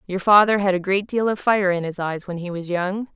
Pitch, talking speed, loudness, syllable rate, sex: 190 Hz, 285 wpm, -20 LUFS, 5.4 syllables/s, female